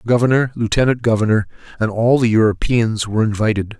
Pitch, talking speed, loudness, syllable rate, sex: 115 Hz, 160 wpm, -17 LUFS, 6.3 syllables/s, male